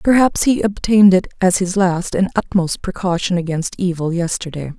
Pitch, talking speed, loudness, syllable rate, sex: 185 Hz, 165 wpm, -17 LUFS, 5.1 syllables/s, female